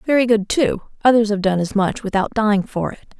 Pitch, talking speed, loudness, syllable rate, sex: 210 Hz, 225 wpm, -18 LUFS, 5.7 syllables/s, female